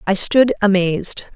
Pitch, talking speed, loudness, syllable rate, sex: 200 Hz, 135 wpm, -16 LUFS, 4.7 syllables/s, female